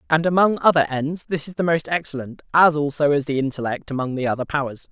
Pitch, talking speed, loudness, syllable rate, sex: 150 Hz, 220 wpm, -20 LUFS, 6.1 syllables/s, male